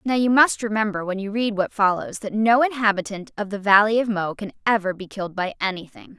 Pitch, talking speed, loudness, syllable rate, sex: 210 Hz, 225 wpm, -21 LUFS, 5.8 syllables/s, female